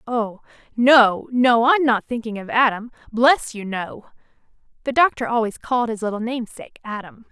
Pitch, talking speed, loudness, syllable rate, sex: 235 Hz, 155 wpm, -19 LUFS, 5.0 syllables/s, female